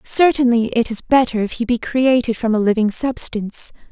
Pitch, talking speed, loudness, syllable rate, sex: 235 Hz, 185 wpm, -17 LUFS, 5.2 syllables/s, female